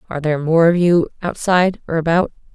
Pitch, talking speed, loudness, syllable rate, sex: 165 Hz, 190 wpm, -17 LUFS, 6.5 syllables/s, female